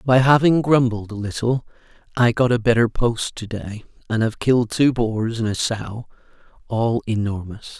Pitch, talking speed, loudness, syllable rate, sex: 115 Hz, 170 wpm, -20 LUFS, 4.6 syllables/s, male